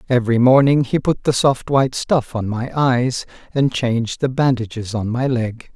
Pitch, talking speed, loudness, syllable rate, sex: 125 Hz, 190 wpm, -18 LUFS, 4.7 syllables/s, male